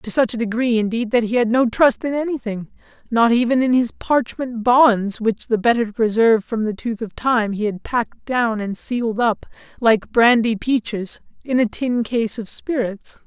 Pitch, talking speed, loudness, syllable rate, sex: 230 Hz, 200 wpm, -19 LUFS, 4.7 syllables/s, male